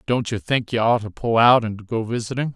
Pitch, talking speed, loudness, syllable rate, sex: 115 Hz, 260 wpm, -20 LUFS, 5.4 syllables/s, male